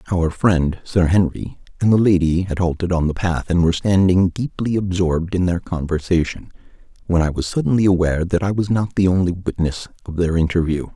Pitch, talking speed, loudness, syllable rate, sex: 90 Hz, 190 wpm, -19 LUFS, 5.6 syllables/s, male